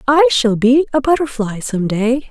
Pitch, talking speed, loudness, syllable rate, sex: 250 Hz, 180 wpm, -15 LUFS, 4.4 syllables/s, female